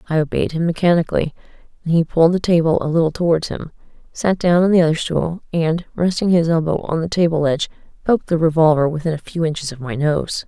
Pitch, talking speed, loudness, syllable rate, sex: 165 Hz, 210 wpm, -18 LUFS, 6.3 syllables/s, female